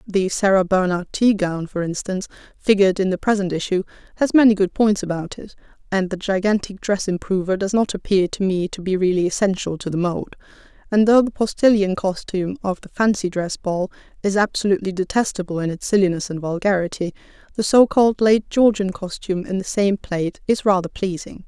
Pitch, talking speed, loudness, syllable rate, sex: 195 Hz, 180 wpm, -20 LUFS, 5.7 syllables/s, female